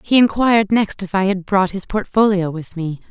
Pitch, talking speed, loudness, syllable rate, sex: 195 Hz, 215 wpm, -17 LUFS, 5.1 syllables/s, female